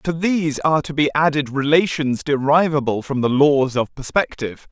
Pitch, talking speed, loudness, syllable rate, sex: 145 Hz, 165 wpm, -18 LUFS, 5.2 syllables/s, male